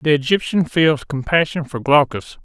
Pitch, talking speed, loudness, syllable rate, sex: 150 Hz, 150 wpm, -17 LUFS, 4.6 syllables/s, male